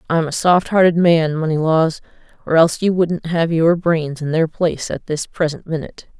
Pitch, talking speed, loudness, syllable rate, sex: 165 Hz, 185 wpm, -17 LUFS, 5.1 syllables/s, female